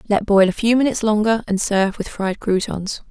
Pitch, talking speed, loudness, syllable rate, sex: 205 Hz, 215 wpm, -18 LUFS, 5.7 syllables/s, female